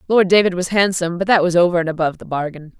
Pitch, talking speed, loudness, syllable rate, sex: 175 Hz, 260 wpm, -17 LUFS, 7.3 syllables/s, female